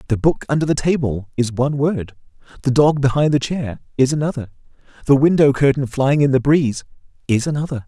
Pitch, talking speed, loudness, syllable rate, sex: 135 Hz, 185 wpm, -18 LUFS, 5.9 syllables/s, male